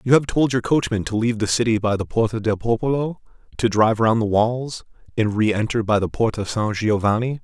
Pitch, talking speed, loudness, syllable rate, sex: 115 Hz, 210 wpm, -20 LUFS, 5.7 syllables/s, male